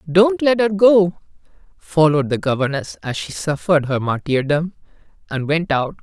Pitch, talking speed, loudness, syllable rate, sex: 165 Hz, 150 wpm, -18 LUFS, 4.9 syllables/s, male